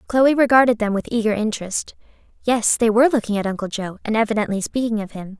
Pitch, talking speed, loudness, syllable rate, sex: 220 Hz, 200 wpm, -19 LUFS, 6.5 syllables/s, female